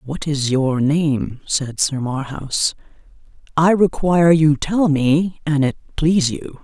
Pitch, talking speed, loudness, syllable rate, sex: 150 Hz, 145 wpm, -18 LUFS, 3.6 syllables/s, female